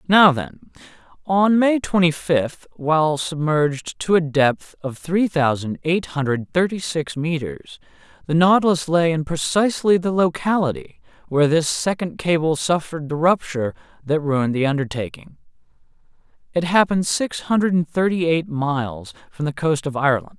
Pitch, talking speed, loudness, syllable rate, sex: 160 Hz, 145 wpm, -20 LUFS, 4.8 syllables/s, male